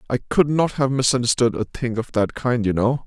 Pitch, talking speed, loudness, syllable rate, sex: 125 Hz, 235 wpm, -20 LUFS, 5.3 syllables/s, male